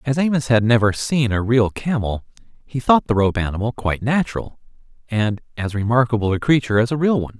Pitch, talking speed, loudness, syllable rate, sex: 120 Hz, 195 wpm, -19 LUFS, 6.0 syllables/s, male